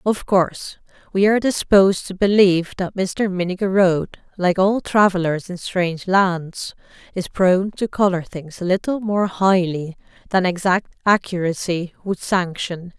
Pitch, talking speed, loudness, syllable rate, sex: 185 Hz, 140 wpm, -19 LUFS, 4.7 syllables/s, female